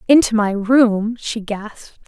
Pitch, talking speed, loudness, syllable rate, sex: 220 Hz, 145 wpm, -17 LUFS, 3.9 syllables/s, female